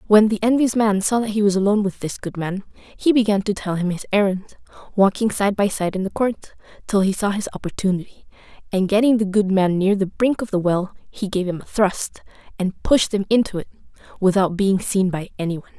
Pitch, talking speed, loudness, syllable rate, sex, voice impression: 200 Hz, 225 wpm, -20 LUFS, 5.7 syllables/s, female, feminine, adult-like, slightly soft, slightly fluent, sincere, friendly, slightly reassuring